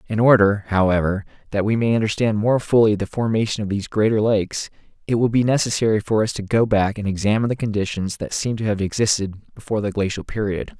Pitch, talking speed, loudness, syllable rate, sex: 105 Hz, 205 wpm, -20 LUFS, 6.3 syllables/s, male